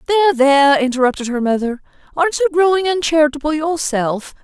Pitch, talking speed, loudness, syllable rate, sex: 295 Hz, 135 wpm, -16 LUFS, 6.1 syllables/s, female